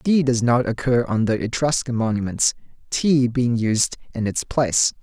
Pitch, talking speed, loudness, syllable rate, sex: 120 Hz, 165 wpm, -20 LUFS, 4.6 syllables/s, male